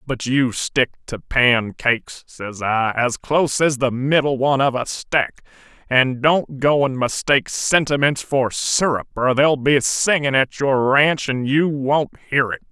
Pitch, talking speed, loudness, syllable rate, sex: 135 Hz, 170 wpm, -18 LUFS, 4.2 syllables/s, male